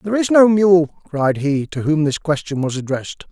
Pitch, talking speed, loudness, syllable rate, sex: 160 Hz, 215 wpm, -17 LUFS, 5.1 syllables/s, male